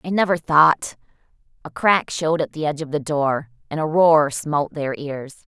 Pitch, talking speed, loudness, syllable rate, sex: 150 Hz, 195 wpm, -20 LUFS, 5.0 syllables/s, female